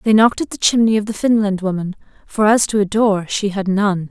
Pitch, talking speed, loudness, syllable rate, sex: 210 Hz, 250 wpm, -16 LUFS, 5.7 syllables/s, female